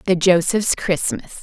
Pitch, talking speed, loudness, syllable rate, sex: 180 Hz, 125 wpm, -18 LUFS, 4.1 syllables/s, female